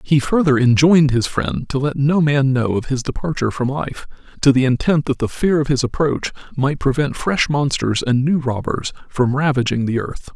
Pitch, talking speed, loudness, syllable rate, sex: 135 Hz, 205 wpm, -18 LUFS, 5.1 syllables/s, male